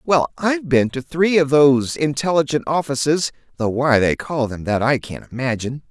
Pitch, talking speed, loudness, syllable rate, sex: 140 Hz, 175 wpm, -19 LUFS, 5.3 syllables/s, male